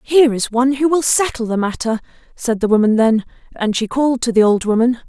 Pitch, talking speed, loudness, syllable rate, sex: 240 Hz, 225 wpm, -16 LUFS, 6.1 syllables/s, female